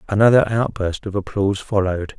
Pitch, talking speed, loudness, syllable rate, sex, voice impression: 100 Hz, 135 wpm, -19 LUFS, 6.0 syllables/s, male, masculine, adult-like, tensed, slightly weak, soft, slightly muffled, slightly raspy, intellectual, calm, mature, slightly friendly, reassuring, wild, lively, slightly kind, slightly modest